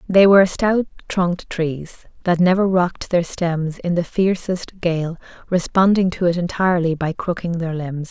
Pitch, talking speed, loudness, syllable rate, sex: 175 Hz, 165 wpm, -19 LUFS, 4.6 syllables/s, female